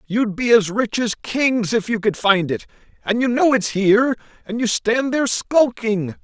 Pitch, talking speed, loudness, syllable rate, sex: 225 Hz, 200 wpm, -18 LUFS, 4.5 syllables/s, male